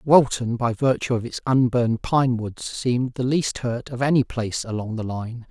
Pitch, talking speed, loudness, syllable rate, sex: 120 Hz, 195 wpm, -23 LUFS, 4.8 syllables/s, male